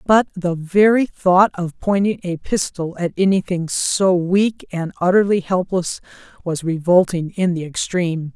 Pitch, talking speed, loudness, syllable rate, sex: 180 Hz, 145 wpm, -18 LUFS, 4.3 syllables/s, female